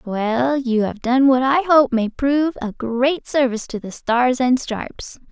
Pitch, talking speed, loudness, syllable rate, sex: 255 Hz, 190 wpm, -18 LUFS, 4.2 syllables/s, female